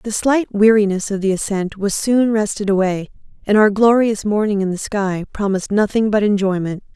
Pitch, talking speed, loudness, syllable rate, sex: 205 Hz, 180 wpm, -17 LUFS, 5.2 syllables/s, female